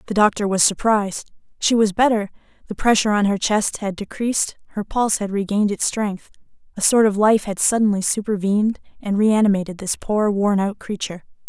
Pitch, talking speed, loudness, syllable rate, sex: 205 Hz, 180 wpm, -19 LUFS, 5.7 syllables/s, female